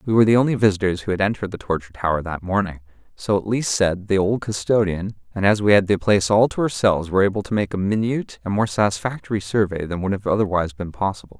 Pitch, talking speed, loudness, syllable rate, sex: 100 Hz, 225 wpm, -20 LUFS, 6.9 syllables/s, male